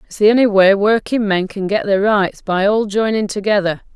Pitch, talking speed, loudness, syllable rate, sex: 205 Hz, 210 wpm, -15 LUFS, 5.1 syllables/s, female